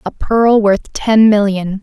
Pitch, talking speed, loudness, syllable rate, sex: 210 Hz, 165 wpm, -12 LUFS, 3.5 syllables/s, female